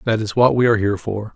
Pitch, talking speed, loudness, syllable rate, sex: 110 Hz, 310 wpm, -18 LUFS, 7.3 syllables/s, male